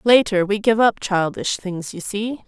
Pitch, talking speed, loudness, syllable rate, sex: 205 Hz, 195 wpm, -20 LUFS, 4.2 syllables/s, female